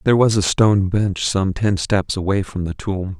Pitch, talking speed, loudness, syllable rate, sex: 100 Hz, 225 wpm, -19 LUFS, 4.9 syllables/s, male